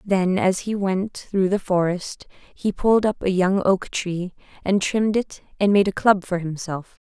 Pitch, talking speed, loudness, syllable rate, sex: 190 Hz, 195 wpm, -22 LUFS, 4.3 syllables/s, female